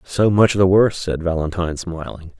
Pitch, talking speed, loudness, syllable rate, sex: 90 Hz, 175 wpm, -18 LUFS, 5.3 syllables/s, male